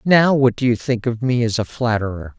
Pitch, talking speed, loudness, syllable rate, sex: 120 Hz, 250 wpm, -18 LUFS, 5.2 syllables/s, male